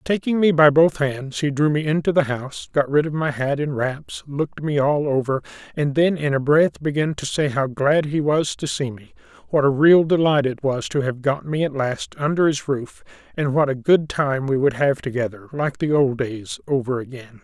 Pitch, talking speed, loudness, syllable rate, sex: 140 Hz, 230 wpm, -20 LUFS, 5.0 syllables/s, male